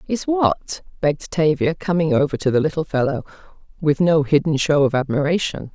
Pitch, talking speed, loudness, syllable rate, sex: 155 Hz, 165 wpm, -19 LUFS, 5.4 syllables/s, female